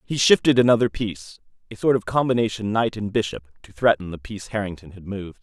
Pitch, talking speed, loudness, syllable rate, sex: 105 Hz, 200 wpm, -22 LUFS, 6.4 syllables/s, male